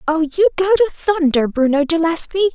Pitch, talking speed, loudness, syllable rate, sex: 330 Hz, 165 wpm, -16 LUFS, 5.6 syllables/s, female